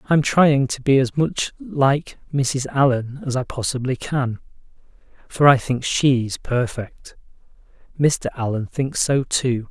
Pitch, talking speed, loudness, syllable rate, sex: 130 Hz, 140 wpm, -20 LUFS, 3.8 syllables/s, male